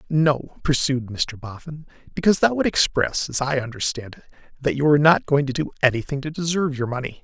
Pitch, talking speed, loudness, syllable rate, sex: 140 Hz, 200 wpm, -21 LUFS, 5.9 syllables/s, male